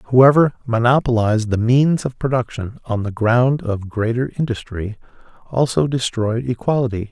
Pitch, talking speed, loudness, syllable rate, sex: 120 Hz, 125 wpm, -18 LUFS, 4.7 syllables/s, male